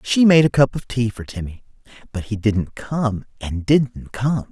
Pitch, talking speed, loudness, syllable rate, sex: 120 Hz, 200 wpm, -20 LUFS, 4.3 syllables/s, male